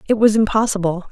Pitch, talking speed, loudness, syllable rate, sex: 205 Hz, 160 wpm, -17 LUFS, 6.7 syllables/s, female